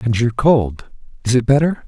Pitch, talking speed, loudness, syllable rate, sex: 125 Hz, 190 wpm, -16 LUFS, 4.9 syllables/s, male